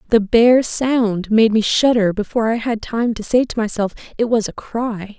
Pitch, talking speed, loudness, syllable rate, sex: 225 Hz, 210 wpm, -17 LUFS, 4.7 syllables/s, female